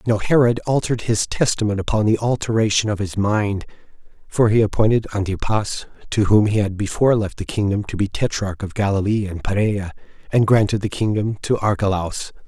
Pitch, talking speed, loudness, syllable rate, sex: 105 Hz, 180 wpm, -20 LUFS, 5.5 syllables/s, male